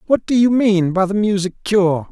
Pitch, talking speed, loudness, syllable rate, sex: 200 Hz, 225 wpm, -16 LUFS, 4.9 syllables/s, male